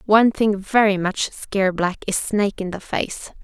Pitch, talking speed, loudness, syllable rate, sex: 200 Hz, 190 wpm, -20 LUFS, 4.7 syllables/s, female